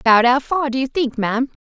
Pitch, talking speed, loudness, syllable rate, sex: 260 Hz, 260 wpm, -18 LUFS, 5.3 syllables/s, female